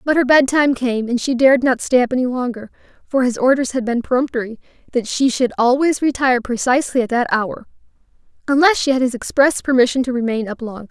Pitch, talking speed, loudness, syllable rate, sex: 250 Hz, 205 wpm, -17 LUFS, 6.3 syllables/s, female